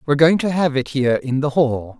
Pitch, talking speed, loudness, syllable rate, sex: 140 Hz, 270 wpm, -18 LUFS, 5.9 syllables/s, male